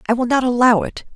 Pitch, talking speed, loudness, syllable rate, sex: 240 Hz, 260 wpm, -16 LUFS, 6.7 syllables/s, female